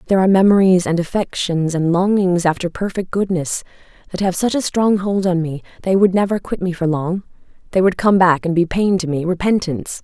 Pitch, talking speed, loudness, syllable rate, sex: 185 Hz, 205 wpm, -17 LUFS, 5.7 syllables/s, female